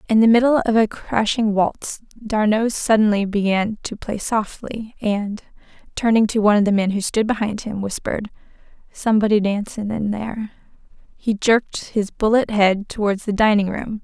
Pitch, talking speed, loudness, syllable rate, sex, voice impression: 215 Hz, 160 wpm, -19 LUFS, 5.0 syllables/s, female, feminine, slightly adult-like, sincere, calm, slightly elegant